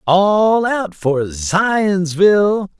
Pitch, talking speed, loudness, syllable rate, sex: 185 Hz, 85 wpm, -15 LUFS, 2.3 syllables/s, male